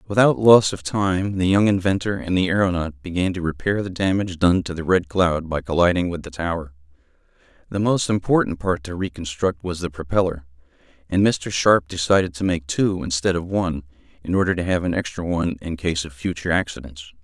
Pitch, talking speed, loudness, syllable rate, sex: 90 Hz, 195 wpm, -21 LUFS, 5.7 syllables/s, male